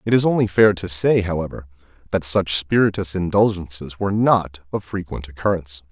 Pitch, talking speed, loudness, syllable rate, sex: 90 Hz, 160 wpm, -19 LUFS, 5.5 syllables/s, male